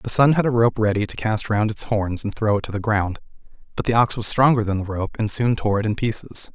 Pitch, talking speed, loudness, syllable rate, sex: 110 Hz, 285 wpm, -21 LUFS, 5.7 syllables/s, male